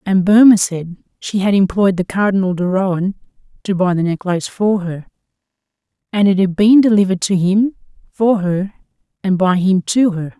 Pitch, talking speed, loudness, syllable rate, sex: 190 Hz, 175 wpm, -15 LUFS, 5.2 syllables/s, female